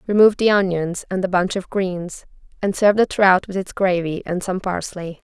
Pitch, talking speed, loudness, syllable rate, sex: 190 Hz, 205 wpm, -19 LUFS, 5.1 syllables/s, female